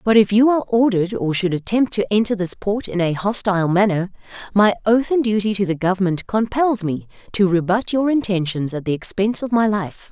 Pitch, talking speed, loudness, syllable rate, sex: 200 Hz, 210 wpm, -19 LUFS, 5.7 syllables/s, female